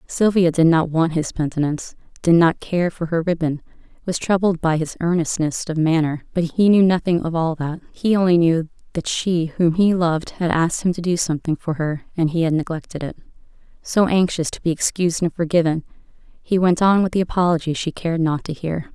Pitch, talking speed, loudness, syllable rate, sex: 170 Hz, 205 wpm, -20 LUFS, 5.6 syllables/s, female